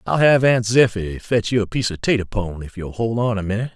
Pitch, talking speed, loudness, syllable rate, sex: 110 Hz, 270 wpm, -19 LUFS, 6.1 syllables/s, male